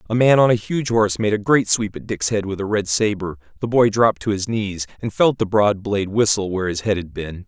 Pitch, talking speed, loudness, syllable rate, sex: 105 Hz, 275 wpm, -19 LUFS, 5.8 syllables/s, male